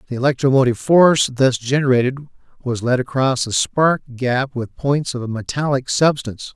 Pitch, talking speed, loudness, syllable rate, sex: 130 Hz, 155 wpm, -18 LUFS, 5.0 syllables/s, male